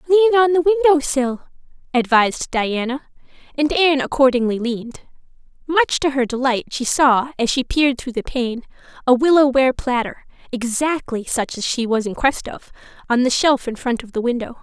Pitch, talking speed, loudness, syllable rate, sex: 265 Hz, 175 wpm, -18 LUFS, 5.4 syllables/s, female